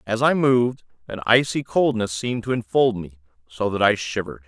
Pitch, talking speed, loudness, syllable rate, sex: 110 Hz, 190 wpm, -21 LUFS, 5.6 syllables/s, male